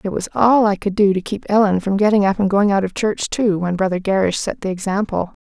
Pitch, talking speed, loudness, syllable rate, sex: 200 Hz, 265 wpm, -17 LUFS, 5.7 syllables/s, female